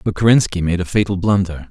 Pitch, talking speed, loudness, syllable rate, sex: 95 Hz, 210 wpm, -16 LUFS, 6.2 syllables/s, male